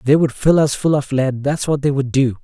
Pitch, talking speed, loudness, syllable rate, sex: 140 Hz, 295 wpm, -17 LUFS, 5.3 syllables/s, male